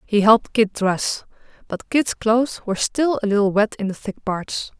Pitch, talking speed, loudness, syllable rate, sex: 215 Hz, 200 wpm, -20 LUFS, 4.9 syllables/s, female